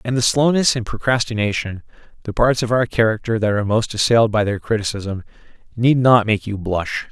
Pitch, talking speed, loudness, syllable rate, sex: 110 Hz, 185 wpm, -18 LUFS, 5.6 syllables/s, male